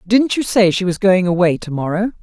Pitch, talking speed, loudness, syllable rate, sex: 190 Hz, 245 wpm, -16 LUFS, 5.4 syllables/s, female